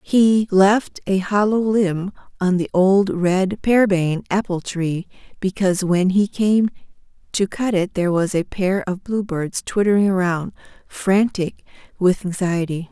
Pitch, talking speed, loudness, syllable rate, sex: 190 Hz, 140 wpm, -19 LUFS, 4.0 syllables/s, female